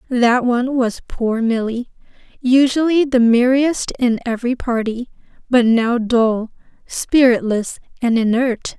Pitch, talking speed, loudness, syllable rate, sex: 245 Hz, 115 wpm, -17 LUFS, 4.0 syllables/s, female